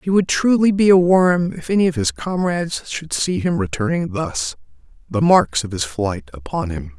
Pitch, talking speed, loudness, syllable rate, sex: 140 Hz, 200 wpm, -18 LUFS, 4.7 syllables/s, male